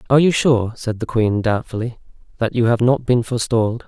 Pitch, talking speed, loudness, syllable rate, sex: 120 Hz, 200 wpm, -18 LUFS, 5.9 syllables/s, male